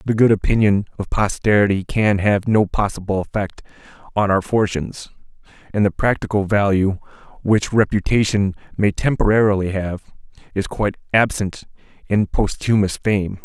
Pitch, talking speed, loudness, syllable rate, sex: 100 Hz, 125 wpm, -19 LUFS, 5.0 syllables/s, male